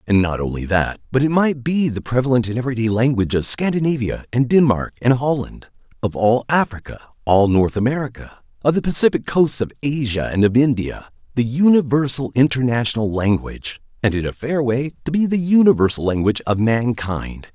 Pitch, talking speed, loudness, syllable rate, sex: 125 Hz, 170 wpm, -18 LUFS, 5.5 syllables/s, male